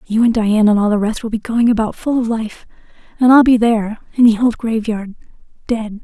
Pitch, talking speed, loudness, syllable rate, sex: 225 Hz, 200 wpm, -15 LUFS, 5.8 syllables/s, female